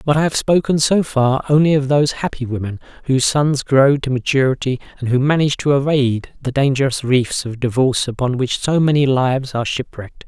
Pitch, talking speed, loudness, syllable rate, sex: 135 Hz, 195 wpm, -17 LUFS, 5.9 syllables/s, male